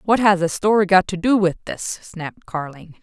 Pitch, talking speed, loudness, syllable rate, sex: 185 Hz, 220 wpm, -19 LUFS, 5.1 syllables/s, female